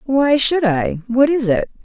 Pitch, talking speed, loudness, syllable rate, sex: 245 Hz, 195 wpm, -16 LUFS, 4.0 syllables/s, female